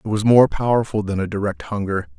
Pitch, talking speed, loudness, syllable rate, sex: 100 Hz, 220 wpm, -19 LUFS, 5.8 syllables/s, male